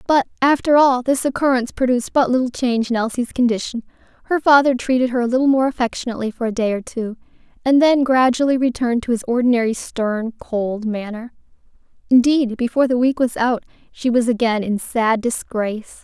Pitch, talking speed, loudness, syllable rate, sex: 245 Hz, 175 wpm, -18 LUFS, 5.9 syllables/s, female